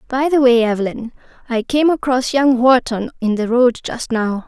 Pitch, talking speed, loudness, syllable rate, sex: 245 Hz, 190 wpm, -16 LUFS, 4.8 syllables/s, female